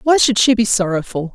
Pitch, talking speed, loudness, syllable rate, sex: 220 Hz, 225 wpm, -15 LUFS, 5.6 syllables/s, female